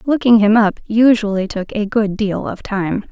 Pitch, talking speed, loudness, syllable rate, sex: 210 Hz, 190 wpm, -16 LUFS, 4.5 syllables/s, female